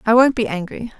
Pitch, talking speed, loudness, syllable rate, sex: 225 Hz, 240 wpm, -17 LUFS, 6.1 syllables/s, female